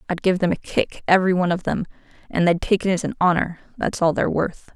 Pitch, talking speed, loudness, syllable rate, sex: 180 Hz, 240 wpm, -21 LUFS, 6.5 syllables/s, female